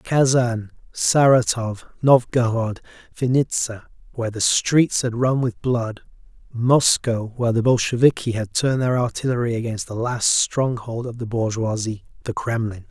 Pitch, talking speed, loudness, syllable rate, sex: 120 Hz, 125 wpm, -20 LUFS, 4.5 syllables/s, male